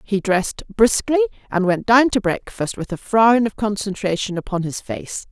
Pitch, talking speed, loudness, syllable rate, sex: 210 Hz, 180 wpm, -19 LUFS, 4.8 syllables/s, female